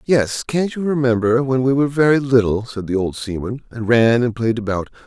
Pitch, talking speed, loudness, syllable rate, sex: 120 Hz, 215 wpm, -18 LUFS, 5.2 syllables/s, male